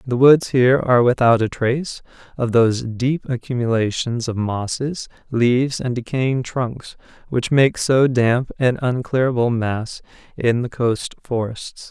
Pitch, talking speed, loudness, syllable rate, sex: 125 Hz, 140 wpm, -19 LUFS, 4.2 syllables/s, male